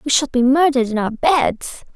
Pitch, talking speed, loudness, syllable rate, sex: 265 Hz, 215 wpm, -16 LUFS, 5.1 syllables/s, female